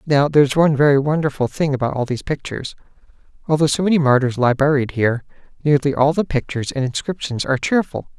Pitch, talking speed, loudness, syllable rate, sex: 140 Hz, 190 wpm, -18 LUFS, 6.8 syllables/s, male